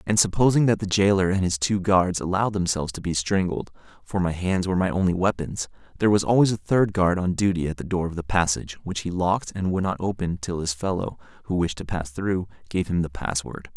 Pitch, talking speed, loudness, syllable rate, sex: 90 Hz, 225 wpm, -24 LUFS, 6.0 syllables/s, male